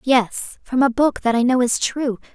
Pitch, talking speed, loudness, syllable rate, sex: 250 Hz, 230 wpm, -19 LUFS, 4.3 syllables/s, female